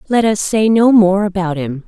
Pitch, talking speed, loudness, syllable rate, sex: 195 Hz, 225 wpm, -13 LUFS, 4.7 syllables/s, female